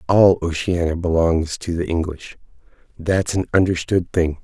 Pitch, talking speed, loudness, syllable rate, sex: 85 Hz, 135 wpm, -19 LUFS, 4.7 syllables/s, male